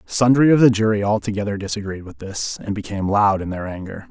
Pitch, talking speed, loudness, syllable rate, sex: 105 Hz, 205 wpm, -19 LUFS, 6.1 syllables/s, male